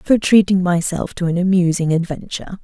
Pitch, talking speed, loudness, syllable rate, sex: 180 Hz, 160 wpm, -17 LUFS, 5.4 syllables/s, female